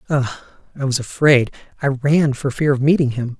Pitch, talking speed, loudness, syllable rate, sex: 135 Hz, 195 wpm, -18 LUFS, 5.6 syllables/s, male